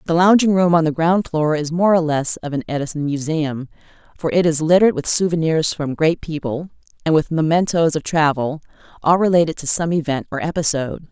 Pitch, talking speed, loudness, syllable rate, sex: 160 Hz, 195 wpm, -18 LUFS, 5.6 syllables/s, female